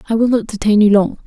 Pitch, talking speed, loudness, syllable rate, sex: 215 Hz, 285 wpm, -14 LUFS, 6.7 syllables/s, female